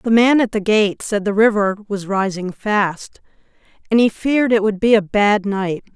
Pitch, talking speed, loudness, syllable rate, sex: 210 Hz, 200 wpm, -17 LUFS, 4.6 syllables/s, female